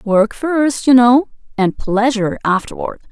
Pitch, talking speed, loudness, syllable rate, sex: 235 Hz, 135 wpm, -15 LUFS, 4.3 syllables/s, female